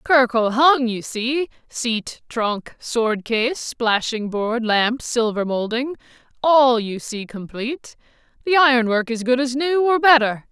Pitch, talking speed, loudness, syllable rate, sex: 245 Hz, 145 wpm, -19 LUFS, 3.8 syllables/s, female